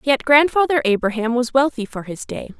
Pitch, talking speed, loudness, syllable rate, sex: 255 Hz, 185 wpm, -18 LUFS, 5.3 syllables/s, female